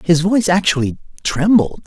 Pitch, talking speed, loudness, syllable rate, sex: 180 Hz, 130 wpm, -16 LUFS, 5.4 syllables/s, male